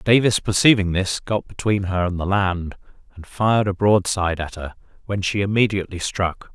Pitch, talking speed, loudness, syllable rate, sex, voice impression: 95 Hz, 175 wpm, -20 LUFS, 5.2 syllables/s, male, very masculine, adult-like, cool, calm, reassuring, elegant, slightly sweet